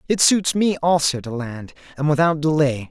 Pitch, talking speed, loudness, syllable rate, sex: 150 Hz, 185 wpm, -19 LUFS, 4.8 syllables/s, male